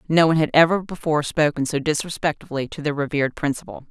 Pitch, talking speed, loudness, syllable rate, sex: 150 Hz, 185 wpm, -21 LUFS, 6.9 syllables/s, female